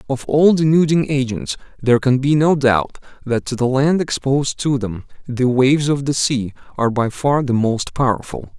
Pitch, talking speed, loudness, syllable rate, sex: 135 Hz, 190 wpm, -17 LUFS, 5.0 syllables/s, male